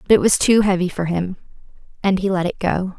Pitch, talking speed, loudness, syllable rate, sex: 185 Hz, 240 wpm, -18 LUFS, 5.7 syllables/s, female